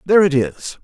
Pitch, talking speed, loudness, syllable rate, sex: 150 Hz, 215 wpm, -16 LUFS, 5.6 syllables/s, male